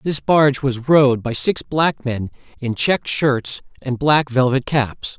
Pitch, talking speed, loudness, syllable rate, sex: 135 Hz, 185 wpm, -18 LUFS, 3.9 syllables/s, male